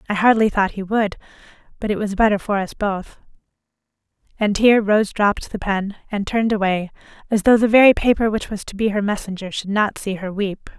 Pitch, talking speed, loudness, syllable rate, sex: 205 Hz, 205 wpm, -19 LUFS, 5.7 syllables/s, female